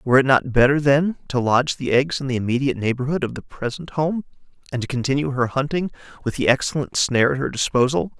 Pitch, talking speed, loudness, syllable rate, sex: 135 Hz, 210 wpm, -21 LUFS, 6.4 syllables/s, male